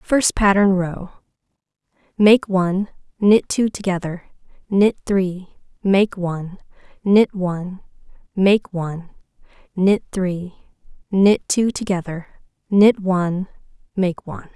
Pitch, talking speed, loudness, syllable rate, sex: 190 Hz, 100 wpm, -19 LUFS, 3.9 syllables/s, female